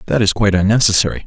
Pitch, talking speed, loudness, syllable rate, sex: 105 Hz, 190 wpm, -14 LUFS, 8.3 syllables/s, male